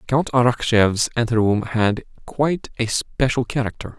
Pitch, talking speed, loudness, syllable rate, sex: 120 Hz, 120 wpm, -20 LUFS, 4.6 syllables/s, male